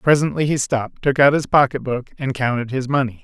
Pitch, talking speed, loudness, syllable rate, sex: 135 Hz, 225 wpm, -19 LUFS, 5.7 syllables/s, male